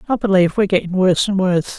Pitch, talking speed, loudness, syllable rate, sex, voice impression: 190 Hz, 235 wpm, -16 LUFS, 8.1 syllables/s, female, feminine, middle-aged, slightly tensed, powerful, slightly soft, slightly muffled, slightly raspy, calm, friendly, slightly reassuring, slightly strict, slightly sharp